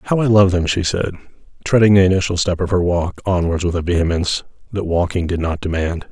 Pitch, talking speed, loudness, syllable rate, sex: 90 Hz, 215 wpm, -17 LUFS, 6.0 syllables/s, male